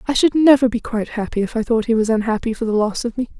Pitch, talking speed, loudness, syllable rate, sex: 230 Hz, 300 wpm, -18 LUFS, 7.0 syllables/s, female